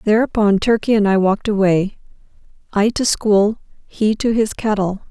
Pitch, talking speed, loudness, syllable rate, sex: 210 Hz, 155 wpm, -17 LUFS, 4.8 syllables/s, female